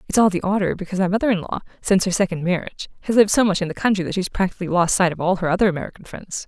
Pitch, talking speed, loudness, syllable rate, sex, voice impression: 185 Hz, 285 wpm, -20 LUFS, 8.2 syllables/s, female, feminine, adult-like, slightly clear, fluent, slightly cool, intellectual